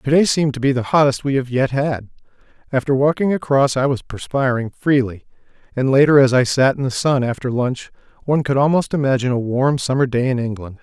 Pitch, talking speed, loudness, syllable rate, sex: 135 Hz, 210 wpm, -18 LUFS, 6.0 syllables/s, male